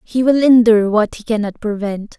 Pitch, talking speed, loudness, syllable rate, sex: 220 Hz, 190 wpm, -15 LUFS, 5.3 syllables/s, female